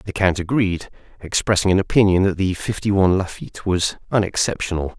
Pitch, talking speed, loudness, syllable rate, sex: 95 Hz, 155 wpm, -20 LUFS, 6.0 syllables/s, male